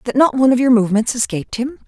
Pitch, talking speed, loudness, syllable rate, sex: 245 Hz, 255 wpm, -16 LUFS, 7.7 syllables/s, female